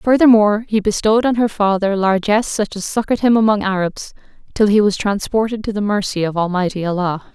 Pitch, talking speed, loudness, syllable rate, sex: 210 Hz, 190 wpm, -16 LUFS, 6.0 syllables/s, female